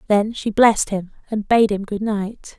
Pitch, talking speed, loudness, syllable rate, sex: 210 Hz, 210 wpm, -19 LUFS, 4.5 syllables/s, female